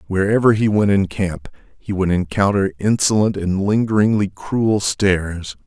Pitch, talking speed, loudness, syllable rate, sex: 100 Hz, 140 wpm, -18 LUFS, 4.5 syllables/s, male